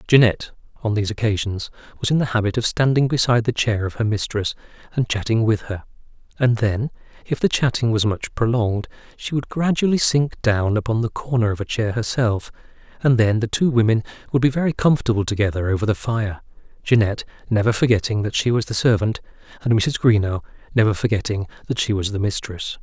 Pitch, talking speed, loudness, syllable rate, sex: 115 Hz, 185 wpm, -20 LUFS, 6.0 syllables/s, male